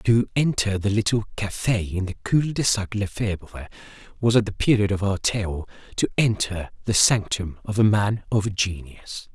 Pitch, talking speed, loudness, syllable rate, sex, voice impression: 100 Hz, 180 wpm, -23 LUFS, 4.5 syllables/s, male, masculine, adult-like, slightly cool, refreshing, friendly, slightly kind